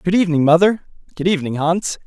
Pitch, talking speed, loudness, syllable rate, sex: 170 Hz, 175 wpm, -17 LUFS, 6.6 syllables/s, male